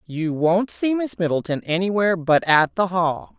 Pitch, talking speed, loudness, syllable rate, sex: 180 Hz, 175 wpm, -20 LUFS, 4.7 syllables/s, female